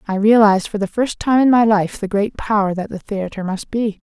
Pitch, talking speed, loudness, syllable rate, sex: 210 Hz, 250 wpm, -17 LUFS, 5.4 syllables/s, female